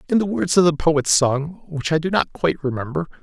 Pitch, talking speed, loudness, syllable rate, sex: 160 Hz, 240 wpm, -20 LUFS, 5.5 syllables/s, male